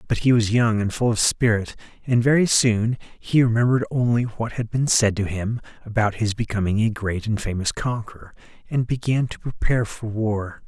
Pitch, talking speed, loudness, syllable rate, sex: 110 Hz, 190 wpm, -22 LUFS, 5.2 syllables/s, male